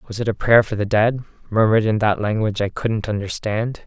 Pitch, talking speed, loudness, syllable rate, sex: 110 Hz, 215 wpm, -19 LUFS, 5.7 syllables/s, male